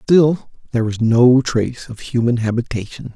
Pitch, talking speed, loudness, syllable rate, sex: 120 Hz, 150 wpm, -17 LUFS, 4.8 syllables/s, male